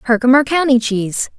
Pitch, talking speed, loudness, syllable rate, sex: 250 Hz, 130 wpm, -14 LUFS, 6.0 syllables/s, female